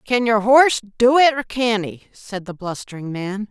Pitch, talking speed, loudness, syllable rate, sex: 220 Hz, 205 wpm, -18 LUFS, 4.8 syllables/s, female